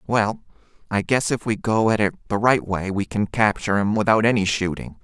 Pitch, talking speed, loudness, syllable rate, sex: 110 Hz, 215 wpm, -21 LUFS, 5.5 syllables/s, male